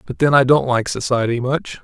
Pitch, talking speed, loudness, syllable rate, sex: 130 Hz, 195 wpm, -17 LUFS, 5.3 syllables/s, male